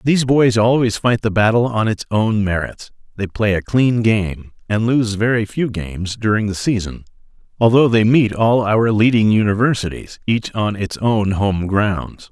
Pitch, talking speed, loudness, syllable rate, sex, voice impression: 110 Hz, 175 wpm, -17 LUFS, 4.5 syllables/s, male, very masculine, slightly old, very thick, slightly tensed, very powerful, bright, soft, very muffled, fluent, slightly raspy, very cool, intellectual, slightly refreshing, sincere, very calm, very mature, friendly, reassuring, very unique, elegant, wild, sweet, lively, very kind, modest